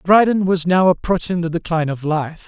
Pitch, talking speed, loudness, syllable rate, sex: 175 Hz, 195 wpm, -17 LUFS, 5.5 syllables/s, male